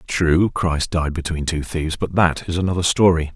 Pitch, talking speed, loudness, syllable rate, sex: 85 Hz, 195 wpm, -19 LUFS, 5.0 syllables/s, male